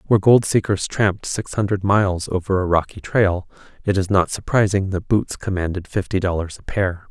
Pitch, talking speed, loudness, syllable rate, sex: 95 Hz, 185 wpm, -20 LUFS, 5.4 syllables/s, male